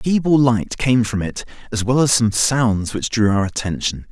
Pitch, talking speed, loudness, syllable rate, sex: 115 Hz, 220 wpm, -18 LUFS, 4.7 syllables/s, male